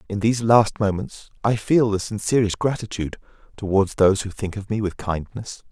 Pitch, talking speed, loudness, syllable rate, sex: 105 Hz, 180 wpm, -21 LUFS, 5.4 syllables/s, male